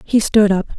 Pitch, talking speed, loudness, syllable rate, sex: 205 Hz, 230 wpm, -15 LUFS, 5.1 syllables/s, female